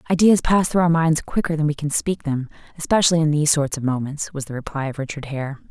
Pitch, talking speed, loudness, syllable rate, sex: 150 Hz, 240 wpm, -20 LUFS, 6.3 syllables/s, female